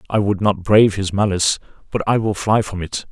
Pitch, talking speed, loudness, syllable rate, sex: 100 Hz, 230 wpm, -18 LUFS, 5.9 syllables/s, male